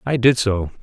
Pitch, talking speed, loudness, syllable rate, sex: 115 Hz, 215 wpm, -18 LUFS, 4.8 syllables/s, male